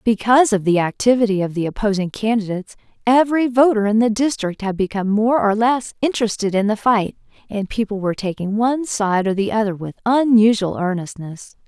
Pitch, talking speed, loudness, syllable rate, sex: 215 Hz, 175 wpm, -18 LUFS, 5.8 syllables/s, female